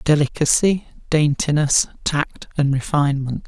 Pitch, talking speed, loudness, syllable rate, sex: 145 Hz, 85 wpm, -19 LUFS, 4.5 syllables/s, male